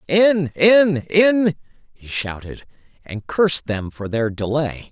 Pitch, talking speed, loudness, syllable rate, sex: 150 Hz, 135 wpm, -18 LUFS, 3.5 syllables/s, male